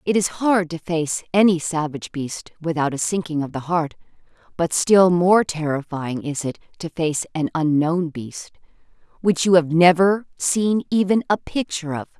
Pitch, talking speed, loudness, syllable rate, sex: 170 Hz, 165 wpm, -20 LUFS, 4.6 syllables/s, female